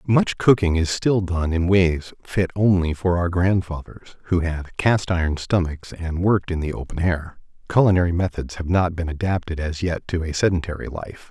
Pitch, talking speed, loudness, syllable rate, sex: 85 Hz, 185 wpm, -21 LUFS, 4.9 syllables/s, male